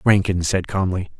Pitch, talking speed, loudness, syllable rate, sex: 95 Hz, 150 wpm, -21 LUFS, 4.8 syllables/s, male